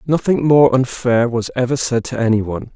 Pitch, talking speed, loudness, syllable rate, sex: 125 Hz, 175 wpm, -16 LUFS, 5.1 syllables/s, male